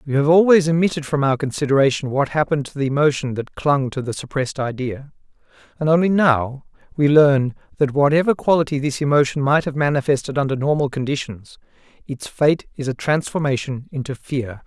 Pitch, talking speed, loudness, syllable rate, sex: 140 Hz, 170 wpm, -19 LUFS, 5.7 syllables/s, male